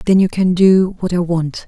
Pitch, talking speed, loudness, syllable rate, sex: 180 Hz, 250 wpm, -15 LUFS, 4.8 syllables/s, female